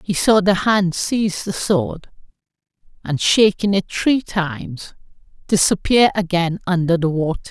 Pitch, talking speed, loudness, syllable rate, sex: 185 Hz, 135 wpm, -18 LUFS, 4.3 syllables/s, female